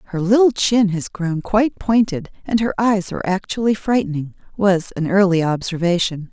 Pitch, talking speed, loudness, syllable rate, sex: 195 Hz, 160 wpm, -18 LUFS, 5.1 syllables/s, female